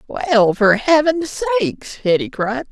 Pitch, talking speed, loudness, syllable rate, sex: 240 Hz, 135 wpm, -17 LUFS, 3.4 syllables/s, female